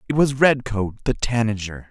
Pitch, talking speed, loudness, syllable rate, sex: 115 Hz, 160 wpm, -21 LUFS, 5.0 syllables/s, male